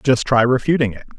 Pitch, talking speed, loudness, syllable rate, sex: 125 Hz, 200 wpm, -17 LUFS, 5.8 syllables/s, male